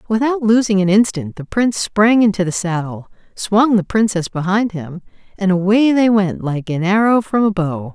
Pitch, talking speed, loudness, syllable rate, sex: 200 Hz, 190 wpm, -16 LUFS, 4.9 syllables/s, female